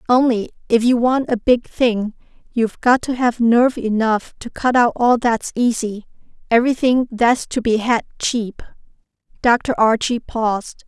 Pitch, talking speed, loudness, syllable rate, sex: 235 Hz, 155 wpm, -18 LUFS, 4.4 syllables/s, female